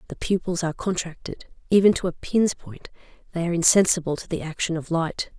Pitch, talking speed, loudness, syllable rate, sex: 170 Hz, 190 wpm, -23 LUFS, 6.0 syllables/s, female